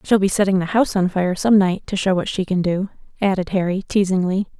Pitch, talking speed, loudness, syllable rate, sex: 190 Hz, 235 wpm, -19 LUFS, 5.9 syllables/s, female